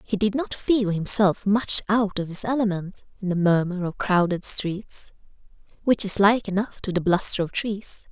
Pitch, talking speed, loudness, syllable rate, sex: 200 Hz, 185 wpm, -22 LUFS, 4.5 syllables/s, female